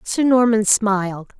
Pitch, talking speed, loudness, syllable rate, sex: 215 Hz, 130 wpm, -17 LUFS, 4.0 syllables/s, female